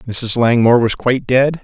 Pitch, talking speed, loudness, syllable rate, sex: 120 Hz, 185 wpm, -14 LUFS, 5.0 syllables/s, male